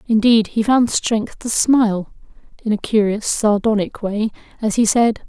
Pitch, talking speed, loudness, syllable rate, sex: 215 Hz, 160 wpm, -17 LUFS, 4.4 syllables/s, female